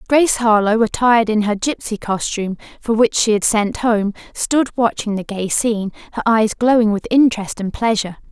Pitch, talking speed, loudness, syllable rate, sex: 220 Hz, 180 wpm, -17 LUFS, 5.5 syllables/s, female